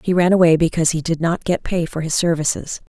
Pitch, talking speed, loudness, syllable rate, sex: 165 Hz, 245 wpm, -18 LUFS, 6.2 syllables/s, female